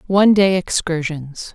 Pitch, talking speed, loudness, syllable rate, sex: 175 Hz, 115 wpm, -16 LUFS, 4.3 syllables/s, female